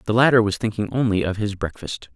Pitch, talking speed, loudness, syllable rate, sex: 105 Hz, 225 wpm, -21 LUFS, 6.0 syllables/s, male